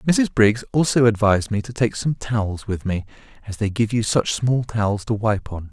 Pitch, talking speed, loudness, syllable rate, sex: 110 Hz, 220 wpm, -21 LUFS, 5.1 syllables/s, male